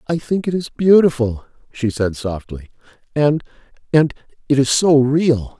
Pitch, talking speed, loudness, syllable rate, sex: 135 Hz, 140 wpm, -17 LUFS, 4.4 syllables/s, male